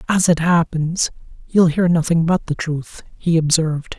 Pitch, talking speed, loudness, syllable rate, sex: 165 Hz, 165 wpm, -18 LUFS, 4.5 syllables/s, male